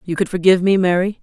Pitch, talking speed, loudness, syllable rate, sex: 185 Hz, 245 wpm, -16 LUFS, 7.1 syllables/s, female